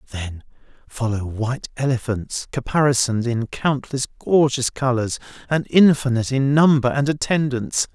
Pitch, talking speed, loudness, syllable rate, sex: 130 Hz, 115 wpm, -20 LUFS, 4.7 syllables/s, male